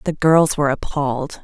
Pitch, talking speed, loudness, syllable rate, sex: 145 Hz, 165 wpm, -18 LUFS, 5.3 syllables/s, female